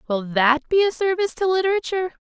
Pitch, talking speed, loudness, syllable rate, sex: 330 Hz, 190 wpm, -20 LUFS, 7.4 syllables/s, female